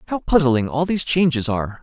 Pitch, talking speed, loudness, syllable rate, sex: 145 Hz, 195 wpm, -19 LUFS, 6.3 syllables/s, male